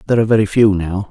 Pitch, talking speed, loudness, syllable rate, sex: 105 Hz, 270 wpm, -14 LUFS, 8.6 syllables/s, male